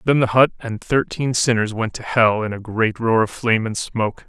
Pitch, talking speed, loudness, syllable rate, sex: 115 Hz, 240 wpm, -19 LUFS, 5.2 syllables/s, male